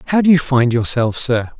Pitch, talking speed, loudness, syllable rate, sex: 130 Hz, 225 wpm, -15 LUFS, 5.4 syllables/s, male